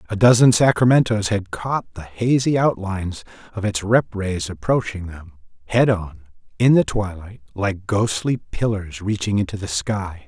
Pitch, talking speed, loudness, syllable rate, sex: 105 Hz, 150 wpm, -20 LUFS, 4.5 syllables/s, male